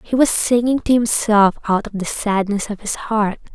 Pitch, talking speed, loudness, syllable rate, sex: 215 Hz, 205 wpm, -18 LUFS, 4.6 syllables/s, female